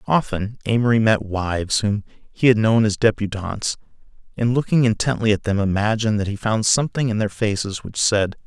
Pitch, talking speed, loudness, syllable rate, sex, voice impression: 110 Hz, 175 wpm, -20 LUFS, 5.5 syllables/s, male, masculine, adult-like, slightly thick, cool, sincere, calm, slightly elegant, slightly wild